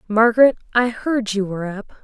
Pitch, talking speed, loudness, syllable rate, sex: 220 Hz, 175 wpm, -18 LUFS, 5.3 syllables/s, female